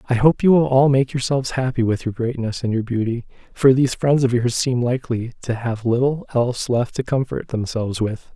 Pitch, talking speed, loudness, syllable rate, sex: 125 Hz, 215 wpm, -20 LUFS, 5.5 syllables/s, male